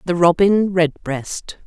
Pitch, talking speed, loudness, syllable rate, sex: 175 Hz, 110 wpm, -17 LUFS, 3.4 syllables/s, female